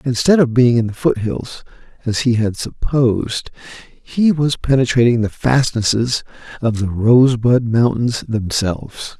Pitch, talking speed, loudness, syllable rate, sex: 120 Hz, 130 wpm, -16 LUFS, 4.4 syllables/s, male